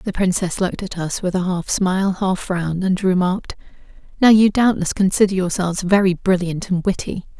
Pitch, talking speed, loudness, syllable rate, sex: 190 Hz, 180 wpm, -18 LUFS, 5.4 syllables/s, female